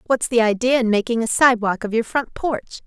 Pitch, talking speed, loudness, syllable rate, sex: 235 Hz, 230 wpm, -19 LUFS, 6.0 syllables/s, female